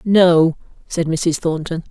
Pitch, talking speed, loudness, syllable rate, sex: 170 Hz, 125 wpm, -17 LUFS, 3.4 syllables/s, female